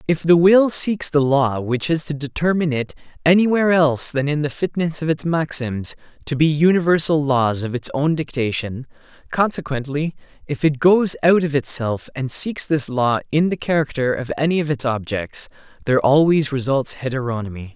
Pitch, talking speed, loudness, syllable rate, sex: 145 Hz, 170 wpm, -19 LUFS, 5.1 syllables/s, male